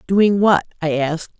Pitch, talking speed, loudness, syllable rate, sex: 180 Hz, 170 wpm, -17 LUFS, 5.0 syllables/s, female